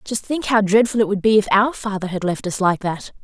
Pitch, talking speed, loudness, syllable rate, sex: 205 Hz, 280 wpm, -19 LUFS, 5.7 syllables/s, female